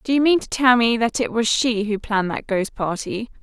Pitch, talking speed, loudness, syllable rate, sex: 230 Hz, 265 wpm, -20 LUFS, 5.3 syllables/s, female